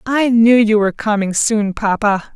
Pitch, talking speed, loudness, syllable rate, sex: 220 Hz, 180 wpm, -14 LUFS, 4.7 syllables/s, female